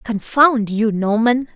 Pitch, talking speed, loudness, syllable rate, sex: 230 Hz, 115 wpm, -16 LUFS, 3.6 syllables/s, female